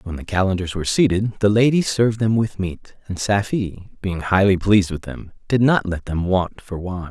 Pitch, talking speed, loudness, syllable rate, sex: 100 Hz, 210 wpm, -20 LUFS, 5.1 syllables/s, male